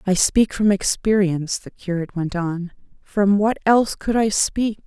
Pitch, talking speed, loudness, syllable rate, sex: 195 Hz, 160 wpm, -20 LUFS, 4.7 syllables/s, female